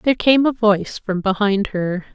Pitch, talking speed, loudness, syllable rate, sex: 210 Hz, 195 wpm, -18 LUFS, 5.2 syllables/s, female